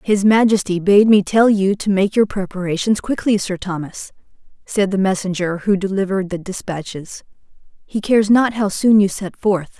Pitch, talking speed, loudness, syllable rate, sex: 195 Hz, 170 wpm, -17 LUFS, 5.0 syllables/s, female